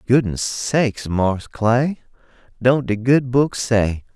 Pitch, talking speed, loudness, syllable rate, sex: 120 Hz, 130 wpm, -19 LUFS, 3.3 syllables/s, male